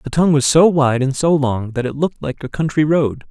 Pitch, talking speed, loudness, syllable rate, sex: 145 Hz, 270 wpm, -16 LUFS, 5.7 syllables/s, male